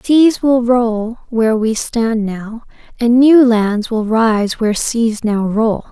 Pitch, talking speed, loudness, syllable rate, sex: 230 Hz, 160 wpm, -14 LUFS, 3.4 syllables/s, female